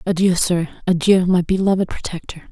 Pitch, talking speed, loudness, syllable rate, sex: 180 Hz, 145 wpm, -18 LUFS, 5.4 syllables/s, female